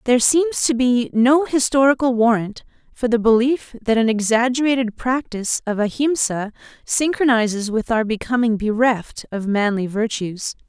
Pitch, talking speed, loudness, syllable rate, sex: 235 Hz, 135 wpm, -19 LUFS, 4.8 syllables/s, female